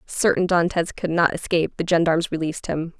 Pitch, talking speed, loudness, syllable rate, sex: 170 Hz, 180 wpm, -21 LUFS, 6.1 syllables/s, female